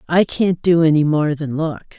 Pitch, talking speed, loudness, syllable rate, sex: 160 Hz, 210 wpm, -17 LUFS, 4.4 syllables/s, female